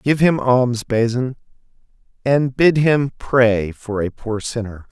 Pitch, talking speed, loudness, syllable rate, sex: 120 Hz, 145 wpm, -18 LUFS, 3.6 syllables/s, male